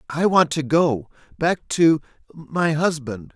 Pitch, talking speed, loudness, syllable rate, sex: 155 Hz, 105 wpm, -20 LUFS, 3.5 syllables/s, male